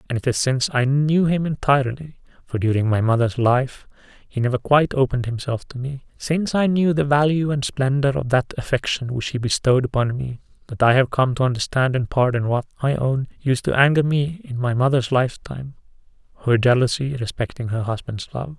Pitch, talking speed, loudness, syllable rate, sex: 130 Hz, 185 wpm, -20 LUFS, 5.7 syllables/s, male